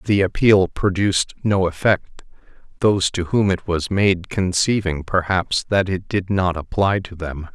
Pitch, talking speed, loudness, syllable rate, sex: 95 Hz, 160 wpm, -19 LUFS, 4.2 syllables/s, male